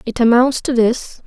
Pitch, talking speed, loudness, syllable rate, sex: 240 Hz, 190 wpm, -15 LUFS, 4.4 syllables/s, female